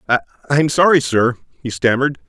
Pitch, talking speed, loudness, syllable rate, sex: 130 Hz, 130 wpm, -16 LUFS, 6.2 syllables/s, male